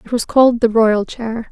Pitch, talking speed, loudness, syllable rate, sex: 230 Hz, 240 wpm, -15 LUFS, 5.0 syllables/s, female